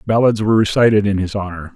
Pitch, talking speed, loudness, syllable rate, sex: 105 Hz, 205 wpm, -15 LUFS, 6.8 syllables/s, male